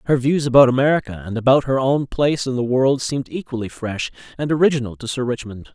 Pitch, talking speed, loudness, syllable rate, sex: 130 Hz, 210 wpm, -19 LUFS, 6.3 syllables/s, male